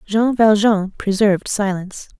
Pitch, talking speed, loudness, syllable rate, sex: 205 Hz, 110 wpm, -17 LUFS, 4.6 syllables/s, female